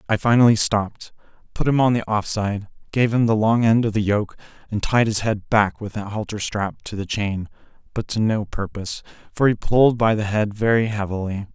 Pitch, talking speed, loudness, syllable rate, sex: 105 Hz, 215 wpm, -21 LUFS, 5.3 syllables/s, male